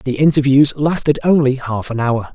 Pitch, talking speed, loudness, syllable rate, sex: 135 Hz, 180 wpm, -15 LUFS, 5.0 syllables/s, male